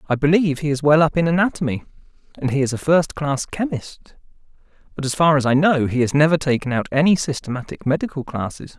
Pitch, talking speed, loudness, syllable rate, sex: 145 Hz, 200 wpm, -19 LUFS, 6.2 syllables/s, male